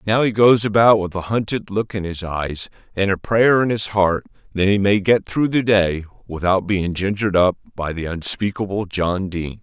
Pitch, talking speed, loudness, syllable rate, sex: 100 Hz, 205 wpm, -19 LUFS, 4.9 syllables/s, male